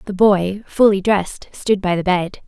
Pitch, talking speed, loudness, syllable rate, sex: 195 Hz, 195 wpm, -17 LUFS, 4.5 syllables/s, female